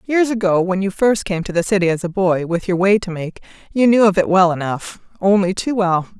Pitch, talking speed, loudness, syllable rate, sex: 190 Hz, 250 wpm, -17 LUFS, 5.5 syllables/s, female